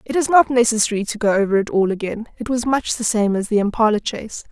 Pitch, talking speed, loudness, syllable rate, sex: 220 Hz, 250 wpm, -18 LUFS, 6.4 syllables/s, female